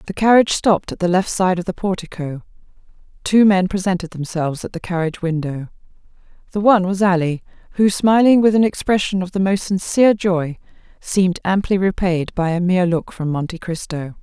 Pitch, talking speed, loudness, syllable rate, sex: 185 Hz, 175 wpm, -18 LUFS, 5.7 syllables/s, female